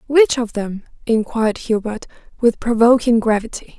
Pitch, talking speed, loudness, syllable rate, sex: 230 Hz, 125 wpm, -17 LUFS, 4.9 syllables/s, female